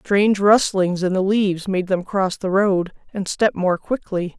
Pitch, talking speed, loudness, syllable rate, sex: 190 Hz, 190 wpm, -19 LUFS, 4.4 syllables/s, female